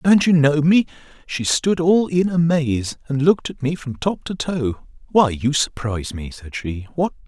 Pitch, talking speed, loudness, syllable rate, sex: 145 Hz, 190 wpm, -19 LUFS, 4.6 syllables/s, male